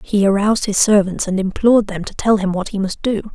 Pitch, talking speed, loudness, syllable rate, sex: 200 Hz, 250 wpm, -17 LUFS, 5.9 syllables/s, female